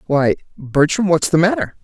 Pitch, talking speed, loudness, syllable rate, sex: 165 Hz, 165 wpm, -16 LUFS, 4.9 syllables/s, male